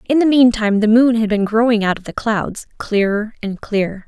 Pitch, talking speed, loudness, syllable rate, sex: 220 Hz, 235 wpm, -16 LUFS, 5.1 syllables/s, female